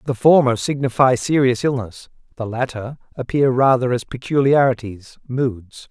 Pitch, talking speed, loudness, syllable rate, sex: 125 Hz, 120 wpm, -18 LUFS, 4.6 syllables/s, male